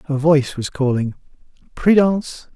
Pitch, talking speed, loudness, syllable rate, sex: 145 Hz, 115 wpm, -18 LUFS, 5.0 syllables/s, male